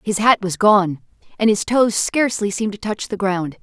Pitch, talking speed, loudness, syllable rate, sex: 205 Hz, 215 wpm, -18 LUFS, 5.0 syllables/s, female